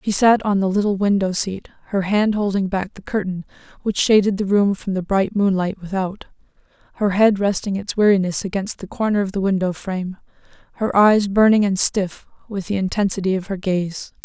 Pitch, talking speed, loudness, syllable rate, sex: 195 Hz, 190 wpm, -19 LUFS, 5.4 syllables/s, female